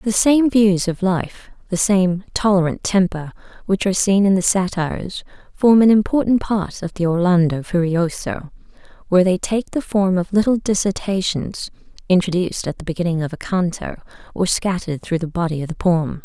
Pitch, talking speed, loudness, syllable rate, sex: 185 Hz, 170 wpm, -18 LUFS, 5.2 syllables/s, female